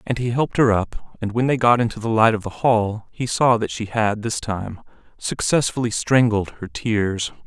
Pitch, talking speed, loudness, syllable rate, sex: 110 Hz, 210 wpm, -20 LUFS, 4.7 syllables/s, male